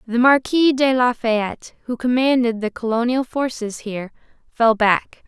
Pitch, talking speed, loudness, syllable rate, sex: 240 Hz, 150 wpm, -19 LUFS, 4.5 syllables/s, female